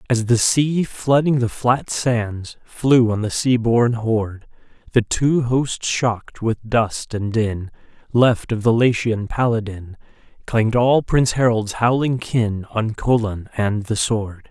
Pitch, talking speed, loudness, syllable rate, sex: 115 Hz, 155 wpm, -19 LUFS, 3.8 syllables/s, male